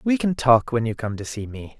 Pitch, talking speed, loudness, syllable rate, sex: 120 Hz, 300 wpm, -22 LUFS, 5.3 syllables/s, male